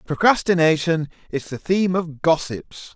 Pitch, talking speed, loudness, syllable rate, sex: 165 Hz, 120 wpm, -20 LUFS, 4.6 syllables/s, male